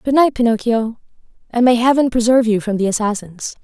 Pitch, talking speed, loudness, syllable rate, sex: 230 Hz, 180 wpm, -16 LUFS, 6.0 syllables/s, female